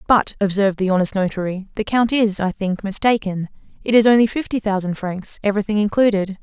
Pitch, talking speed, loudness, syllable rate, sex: 205 Hz, 175 wpm, -19 LUFS, 5.9 syllables/s, female